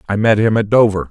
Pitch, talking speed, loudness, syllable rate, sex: 105 Hz, 270 wpm, -14 LUFS, 6.5 syllables/s, male